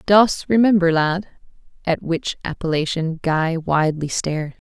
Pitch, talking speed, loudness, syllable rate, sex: 170 Hz, 115 wpm, -20 LUFS, 4.4 syllables/s, female